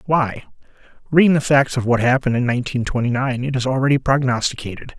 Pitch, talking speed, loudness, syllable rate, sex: 130 Hz, 180 wpm, -18 LUFS, 6.4 syllables/s, male